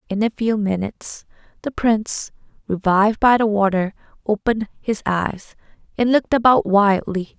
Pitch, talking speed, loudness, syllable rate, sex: 210 Hz, 140 wpm, -19 LUFS, 5.0 syllables/s, female